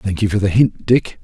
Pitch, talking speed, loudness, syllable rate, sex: 100 Hz, 290 wpm, -16 LUFS, 5.1 syllables/s, male